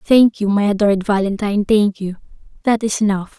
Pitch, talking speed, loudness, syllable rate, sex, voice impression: 205 Hz, 175 wpm, -17 LUFS, 5.7 syllables/s, female, feminine, young, relaxed, soft, slightly halting, cute, friendly, reassuring, sweet, kind, modest